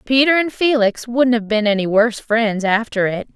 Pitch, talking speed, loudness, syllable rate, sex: 230 Hz, 195 wpm, -17 LUFS, 5.1 syllables/s, female